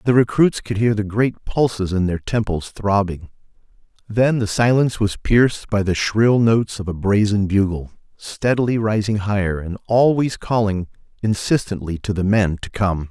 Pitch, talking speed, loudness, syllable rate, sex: 105 Hz, 165 wpm, -19 LUFS, 4.8 syllables/s, male